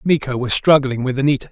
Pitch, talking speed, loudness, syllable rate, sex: 135 Hz, 200 wpm, -17 LUFS, 6.4 syllables/s, male